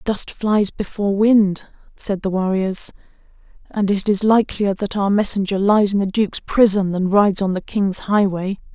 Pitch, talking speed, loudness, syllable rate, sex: 200 Hz, 170 wpm, -18 LUFS, 4.8 syllables/s, female